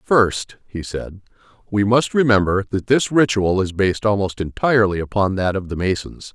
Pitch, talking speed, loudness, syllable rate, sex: 105 Hz, 170 wpm, -19 LUFS, 5.0 syllables/s, male